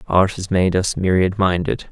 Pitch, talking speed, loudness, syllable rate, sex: 95 Hz, 190 wpm, -18 LUFS, 4.6 syllables/s, male